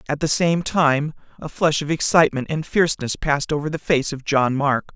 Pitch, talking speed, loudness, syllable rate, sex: 150 Hz, 205 wpm, -20 LUFS, 5.3 syllables/s, male